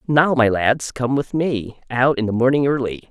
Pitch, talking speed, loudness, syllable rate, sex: 125 Hz, 210 wpm, -19 LUFS, 4.6 syllables/s, male